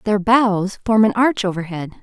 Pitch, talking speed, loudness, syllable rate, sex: 205 Hz, 175 wpm, -17 LUFS, 4.6 syllables/s, female